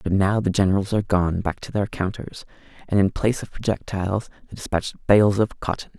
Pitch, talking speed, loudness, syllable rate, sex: 100 Hz, 200 wpm, -22 LUFS, 5.8 syllables/s, male